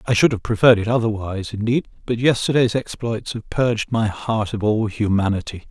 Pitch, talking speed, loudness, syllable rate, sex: 110 Hz, 180 wpm, -20 LUFS, 5.6 syllables/s, male